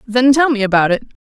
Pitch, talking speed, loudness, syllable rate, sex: 235 Hz, 245 wpm, -13 LUFS, 6.5 syllables/s, female